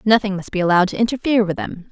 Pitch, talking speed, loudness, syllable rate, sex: 200 Hz, 250 wpm, -18 LUFS, 7.8 syllables/s, female